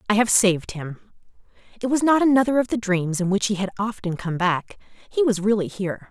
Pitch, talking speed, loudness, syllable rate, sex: 205 Hz, 215 wpm, -21 LUFS, 5.9 syllables/s, female